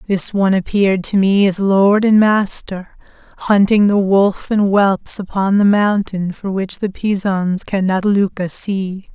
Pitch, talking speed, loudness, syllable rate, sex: 195 Hz, 160 wpm, -15 LUFS, 4.0 syllables/s, female